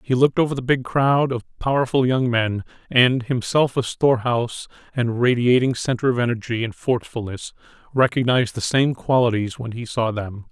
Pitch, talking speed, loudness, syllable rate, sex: 120 Hz, 165 wpm, -20 LUFS, 5.4 syllables/s, male